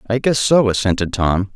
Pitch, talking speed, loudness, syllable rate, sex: 110 Hz, 195 wpm, -16 LUFS, 5.2 syllables/s, male